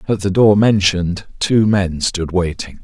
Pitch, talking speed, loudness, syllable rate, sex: 95 Hz, 170 wpm, -15 LUFS, 4.3 syllables/s, male